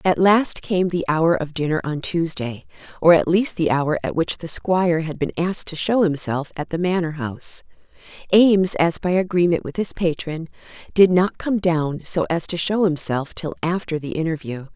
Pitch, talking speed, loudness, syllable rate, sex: 170 Hz, 195 wpm, -20 LUFS, 4.9 syllables/s, female